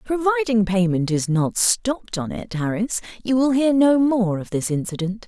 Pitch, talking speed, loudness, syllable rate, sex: 220 Hz, 180 wpm, -20 LUFS, 4.7 syllables/s, female